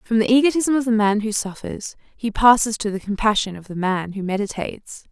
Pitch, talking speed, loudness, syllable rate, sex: 215 Hz, 210 wpm, -20 LUFS, 5.6 syllables/s, female